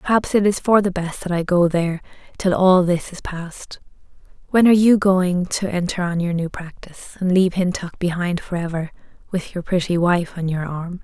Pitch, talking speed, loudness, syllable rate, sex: 180 Hz, 200 wpm, -19 LUFS, 5.3 syllables/s, female